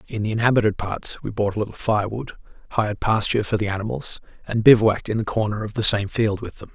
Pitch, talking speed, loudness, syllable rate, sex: 105 Hz, 220 wpm, -22 LUFS, 6.7 syllables/s, male